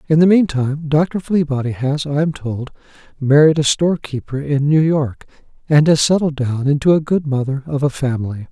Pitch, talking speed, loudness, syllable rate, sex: 145 Hz, 190 wpm, -16 LUFS, 5.3 syllables/s, male